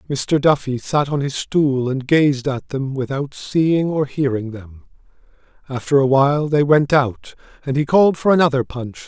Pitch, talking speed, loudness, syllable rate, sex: 140 Hz, 180 wpm, -18 LUFS, 4.5 syllables/s, male